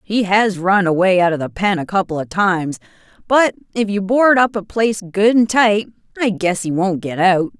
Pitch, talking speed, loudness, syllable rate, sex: 195 Hz, 220 wpm, -16 LUFS, 5.1 syllables/s, female